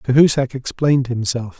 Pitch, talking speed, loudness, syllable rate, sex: 130 Hz, 115 wpm, -18 LUFS, 5.2 syllables/s, male